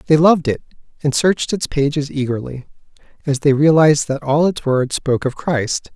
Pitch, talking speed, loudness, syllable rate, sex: 145 Hz, 180 wpm, -17 LUFS, 5.4 syllables/s, male